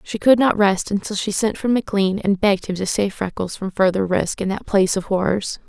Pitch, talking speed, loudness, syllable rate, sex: 200 Hz, 245 wpm, -19 LUFS, 5.6 syllables/s, female